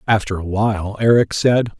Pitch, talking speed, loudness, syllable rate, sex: 105 Hz, 165 wpm, -17 LUFS, 5.1 syllables/s, male